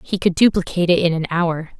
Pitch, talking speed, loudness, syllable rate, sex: 175 Hz, 235 wpm, -18 LUFS, 6.2 syllables/s, female